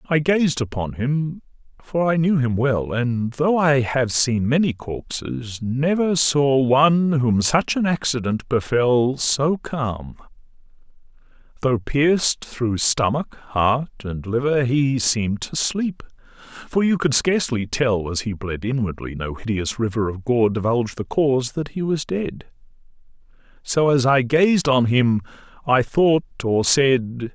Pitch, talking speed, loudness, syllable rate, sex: 130 Hz, 145 wpm, -20 LUFS, 3.2 syllables/s, male